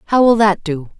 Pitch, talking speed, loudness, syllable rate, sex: 195 Hz, 240 wpm, -14 LUFS, 5.7 syllables/s, female